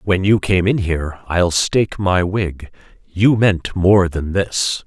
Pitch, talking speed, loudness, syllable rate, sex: 90 Hz, 175 wpm, -17 LUFS, 3.6 syllables/s, male